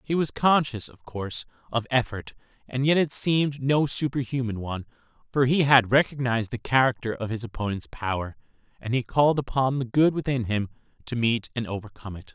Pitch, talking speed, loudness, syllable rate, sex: 125 Hz, 180 wpm, -25 LUFS, 5.7 syllables/s, male